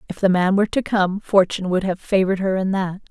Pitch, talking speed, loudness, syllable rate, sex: 190 Hz, 250 wpm, -19 LUFS, 6.3 syllables/s, female